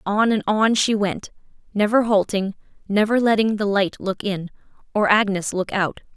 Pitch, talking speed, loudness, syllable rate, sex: 205 Hz, 165 wpm, -20 LUFS, 4.6 syllables/s, female